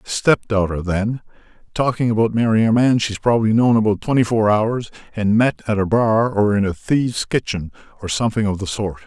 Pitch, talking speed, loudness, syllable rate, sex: 110 Hz, 185 wpm, -18 LUFS, 5.4 syllables/s, male